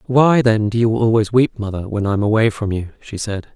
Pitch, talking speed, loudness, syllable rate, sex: 110 Hz, 255 wpm, -17 LUFS, 5.7 syllables/s, male